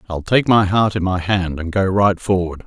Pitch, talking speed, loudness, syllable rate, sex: 95 Hz, 250 wpm, -17 LUFS, 4.8 syllables/s, male